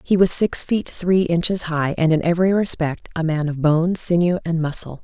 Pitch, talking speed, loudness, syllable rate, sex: 170 Hz, 215 wpm, -19 LUFS, 5.0 syllables/s, female